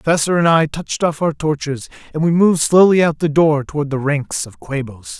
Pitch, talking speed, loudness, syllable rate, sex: 155 Hz, 230 wpm, -16 LUFS, 5.7 syllables/s, male